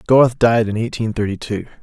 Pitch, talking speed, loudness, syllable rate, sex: 110 Hz, 195 wpm, -17 LUFS, 5.9 syllables/s, male